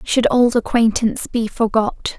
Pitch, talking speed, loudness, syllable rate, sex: 230 Hz, 135 wpm, -17 LUFS, 4.3 syllables/s, female